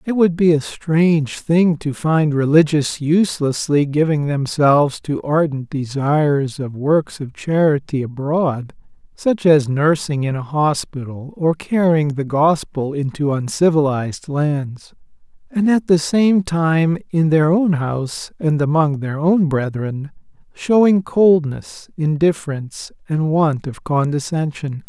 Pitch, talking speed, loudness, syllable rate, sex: 155 Hz, 130 wpm, -17 LUFS, 4.0 syllables/s, male